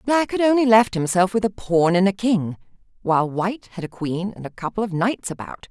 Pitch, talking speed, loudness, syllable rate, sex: 200 Hz, 230 wpm, -21 LUFS, 5.5 syllables/s, female